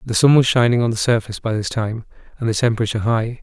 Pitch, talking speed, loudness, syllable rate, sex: 115 Hz, 245 wpm, -18 LUFS, 7.0 syllables/s, male